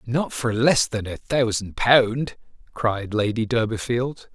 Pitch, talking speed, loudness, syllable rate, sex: 115 Hz, 140 wpm, -22 LUFS, 3.6 syllables/s, male